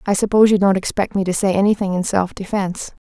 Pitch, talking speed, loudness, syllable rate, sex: 195 Hz, 235 wpm, -18 LUFS, 6.6 syllables/s, female